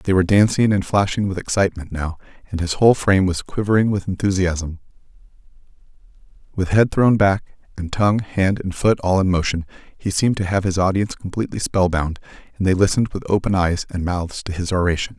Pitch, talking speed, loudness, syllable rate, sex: 95 Hz, 190 wpm, -19 LUFS, 6.0 syllables/s, male